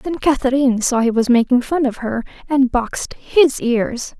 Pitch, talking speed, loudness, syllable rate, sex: 255 Hz, 185 wpm, -17 LUFS, 4.7 syllables/s, female